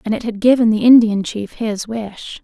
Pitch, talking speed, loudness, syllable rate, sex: 220 Hz, 220 wpm, -15 LUFS, 4.7 syllables/s, female